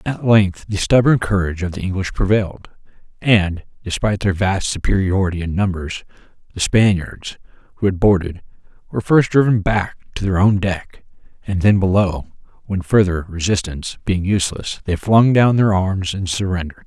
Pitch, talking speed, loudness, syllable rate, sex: 95 Hz, 155 wpm, -18 LUFS, 5.2 syllables/s, male